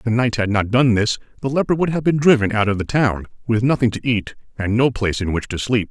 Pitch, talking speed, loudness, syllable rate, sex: 115 Hz, 285 wpm, -19 LUFS, 6.2 syllables/s, male